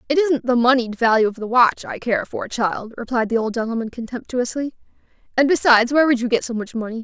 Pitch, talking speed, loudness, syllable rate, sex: 240 Hz, 220 wpm, -19 LUFS, 6.1 syllables/s, female